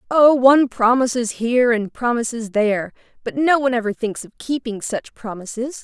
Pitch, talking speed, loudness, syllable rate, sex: 240 Hz, 165 wpm, -18 LUFS, 5.3 syllables/s, female